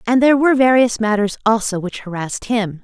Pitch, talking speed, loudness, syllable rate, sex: 220 Hz, 190 wpm, -16 LUFS, 6.2 syllables/s, female